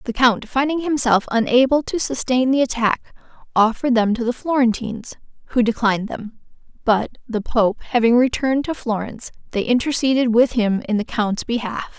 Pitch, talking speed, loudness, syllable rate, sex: 240 Hz, 160 wpm, -19 LUFS, 5.4 syllables/s, female